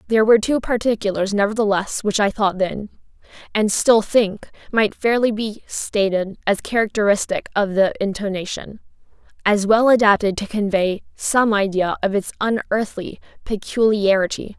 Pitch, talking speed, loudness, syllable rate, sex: 205 Hz, 130 wpm, -19 LUFS, 4.8 syllables/s, female